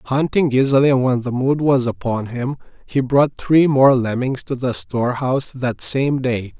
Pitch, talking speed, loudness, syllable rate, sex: 130 Hz, 180 wpm, -18 LUFS, 4.5 syllables/s, male